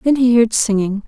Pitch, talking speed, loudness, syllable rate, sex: 225 Hz, 225 wpm, -15 LUFS, 4.9 syllables/s, female